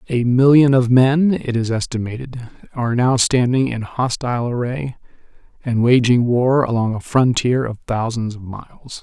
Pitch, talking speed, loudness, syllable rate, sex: 125 Hz, 155 wpm, -17 LUFS, 4.7 syllables/s, male